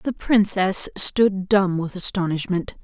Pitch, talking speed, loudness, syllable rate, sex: 190 Hz, 125 wpm, -20 LUFS, 3.9 syllables/s, female